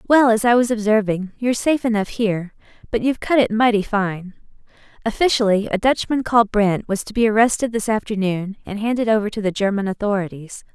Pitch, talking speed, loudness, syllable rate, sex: 215 Hz, 185 wpm, -19 LUFS, 6.1 syllables/s, female